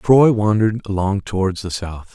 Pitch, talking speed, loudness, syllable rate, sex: 100 Hz, 170 wpm, -18 LUFS, 4.8 syllables/s, male